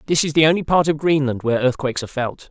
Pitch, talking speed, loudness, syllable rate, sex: 145 Hz, 265 wpm, -18 LUFS, 7.3 syllables/s, male